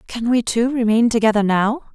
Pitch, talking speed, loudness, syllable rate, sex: 230 Hz, 185 wpm, -17 LUFS, 5.2 syllables/s, female